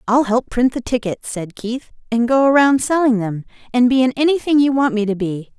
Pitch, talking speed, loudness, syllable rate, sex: 240 Hz, 225 wpm, -17 LUFS, 5.4 syllables/s, female